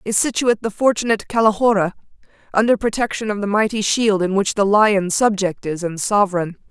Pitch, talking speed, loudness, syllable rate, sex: 205 Hz, 170 wpm, -18 LUFS, 5.8 syllables/s, female